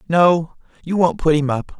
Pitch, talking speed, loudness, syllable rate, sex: 165 Hz, 200 wpm, -17 LUFS, 4.5 syllables/s, male